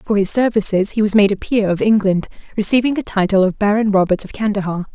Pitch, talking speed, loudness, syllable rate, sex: 205 Hz, 220 wpm, -16 LUFS, 6.2 syllables/s, female